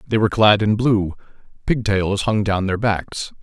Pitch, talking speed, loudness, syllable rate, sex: 105 Hz, 175 wpm, -19 LUFS, 4.4 syllables/s, male